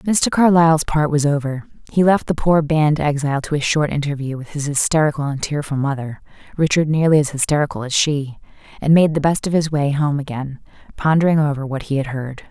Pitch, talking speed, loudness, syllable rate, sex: 150 Hz, 200 wpm, -18 LUFS, 5.8 syllables/s, female